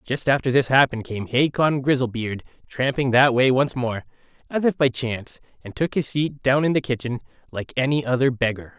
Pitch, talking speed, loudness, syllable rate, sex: 130 Hz, 190 wpm, -21 LUFS, 5.4 syllables/s, male